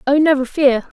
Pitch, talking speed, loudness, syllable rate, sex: 275 Hz, 180 wpm, -15 LUFS, 5.2 syllables/s, female